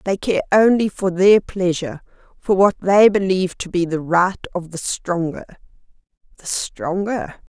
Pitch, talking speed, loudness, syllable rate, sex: 185 Hz, 150 wpm, -18 LUFS, 4.4 syllables/s, female